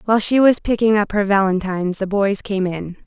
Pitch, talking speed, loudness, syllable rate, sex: 200 Hz, 215 wpm, -17 LUFS, 5.6 syllables/s, female